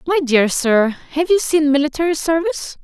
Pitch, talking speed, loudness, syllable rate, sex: 300 Hz, 170 wpm, -16 LUFS, 5.3 syllables/s, female